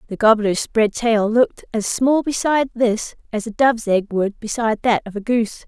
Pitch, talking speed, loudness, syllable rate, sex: 225 Hz, 200 wpm, -19 LUFS, 5.2 syllables/s, female